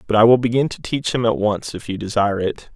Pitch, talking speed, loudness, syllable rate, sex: 110 Hz, 285 wpm, -19 LUFS, 6.2 syllables/s, male